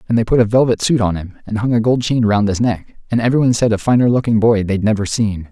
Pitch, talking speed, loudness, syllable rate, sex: 110 Hz, 285 wpm, -15 LUFS, 6.4 syllables/s, male